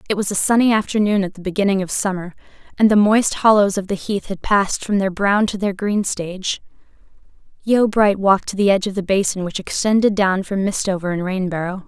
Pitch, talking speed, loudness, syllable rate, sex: 195 Hz, 205 wpm, -18 LUFS, 5.9 syllables/s, female